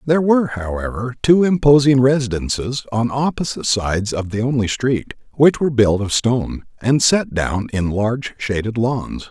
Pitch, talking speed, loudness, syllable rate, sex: 120 Hz, 160 wpm, -18 LUFS, 5.1 syllables/s, male